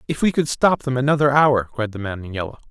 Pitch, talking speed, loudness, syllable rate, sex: 130 Hz, 265 wpm, -19 LUFS, 6.1 syllables/s, male